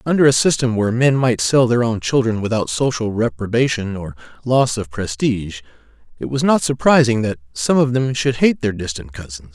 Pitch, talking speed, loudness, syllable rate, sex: 115 Hz, 190 wpm, -17 LUFS, 5.4 syllables/s, male